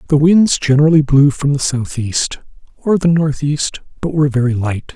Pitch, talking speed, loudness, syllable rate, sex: 145 Hz, 170 wpm, -14 LUFS, 4.9 syllables/s, male